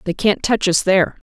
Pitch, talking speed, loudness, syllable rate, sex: 195 Hz, 230 wpm, -17 LUFS, 5.5 syllables/s, female